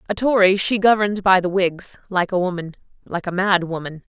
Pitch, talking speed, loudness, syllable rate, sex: 190 Hz, 190 wpm, -19 LUFS, 5.5 syllables/s, female